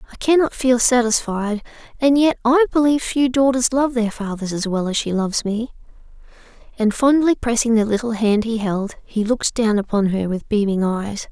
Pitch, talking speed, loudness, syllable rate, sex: 230 Hz, 185 wpm, -19 LUFS, 5.2 syllables/s, female